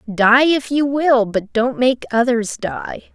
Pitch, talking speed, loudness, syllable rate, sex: 245 Hz, 170 wpm, -16 LUFS, 3.5 syllables/s, female